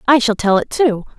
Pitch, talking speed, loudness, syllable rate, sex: 235 Hz, 255 wpm, -15 LUFS, 5.3 syllables/s, female